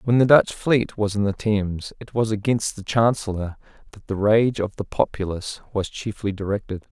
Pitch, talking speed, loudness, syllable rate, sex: 105 Hz, 190 wpm, -22 LUFS, 5.1 syllables/s, male